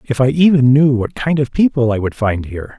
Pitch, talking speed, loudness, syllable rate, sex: 130 Hz, 260 wpm, -14 LUFS, 5.6 syllables/s, male